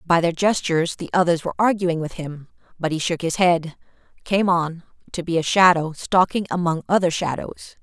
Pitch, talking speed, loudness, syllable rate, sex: 170 Hz, 185 wpm, -21 LUFS, 5.5 syllables/s, female